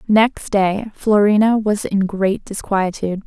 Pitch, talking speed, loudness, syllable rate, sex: 205 Hz, 130 wpm, -17 LUFS, 3.9 syllables/s, female